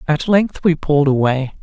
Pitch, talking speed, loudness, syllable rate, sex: 155 Hz, 185 wpm, -16 LUFS, 5.0 syllables/s, female